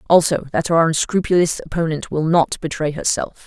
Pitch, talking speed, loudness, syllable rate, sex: 160 Hz, 155 wpm, -18 LUFS, 5.4 syllables/s, female